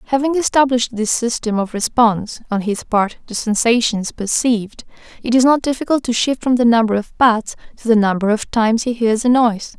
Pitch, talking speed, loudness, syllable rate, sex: 230 Hz, 195 wpm, -16 LUFS, 5.6 syllables/s, female